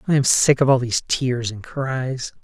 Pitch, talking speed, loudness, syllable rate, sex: 130 Hz, 220 wpm, -20 LUFS, 4.6 syllables/s, male